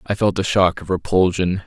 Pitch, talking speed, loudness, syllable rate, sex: 95 Hz, 215 wpm, -19 LUFS, 5.1 syllables/s, male